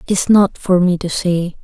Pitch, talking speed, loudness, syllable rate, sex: 185 Hz, 255 wpm, -15 LUFS, 4.6 syllables/s, female